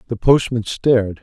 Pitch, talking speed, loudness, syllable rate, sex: 115 Hz, 145 wpm, -17 LUFS, 4.9 syllables/s, male